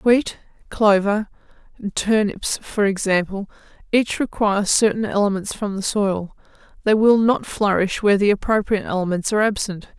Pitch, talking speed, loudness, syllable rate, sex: 205 Hz, 130 wpm, -20 LUFS, 5.0 syllables/s, female